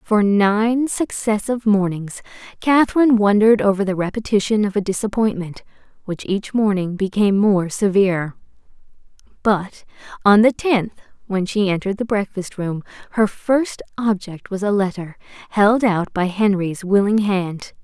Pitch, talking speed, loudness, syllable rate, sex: 205 Hz, 135 wpm, -18 LUFS, 4.8 syllables/s, female